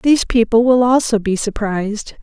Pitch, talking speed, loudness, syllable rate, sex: 225 Hz, 160 wpm, -15 LUFS, 5.1 syllables/s, female